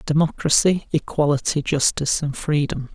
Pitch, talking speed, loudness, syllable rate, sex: 150 Hz, 100 wpm, -20 LUFS, 5.1 syllables/s, male